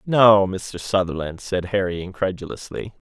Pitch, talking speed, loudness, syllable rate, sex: 95 Hz, 115 wpm, -21 LUFS, 4.6 syllables/s, male